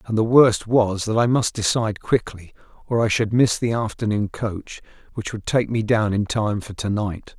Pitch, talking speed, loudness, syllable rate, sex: 110 Hz, 210 wpm, -21 LUFS, 4.7 syllables/s, male